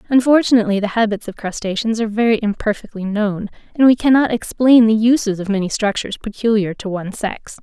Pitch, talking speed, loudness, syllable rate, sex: 215 Hz, 175 wpm, -17 LUFS, 6.2 syllables/s, female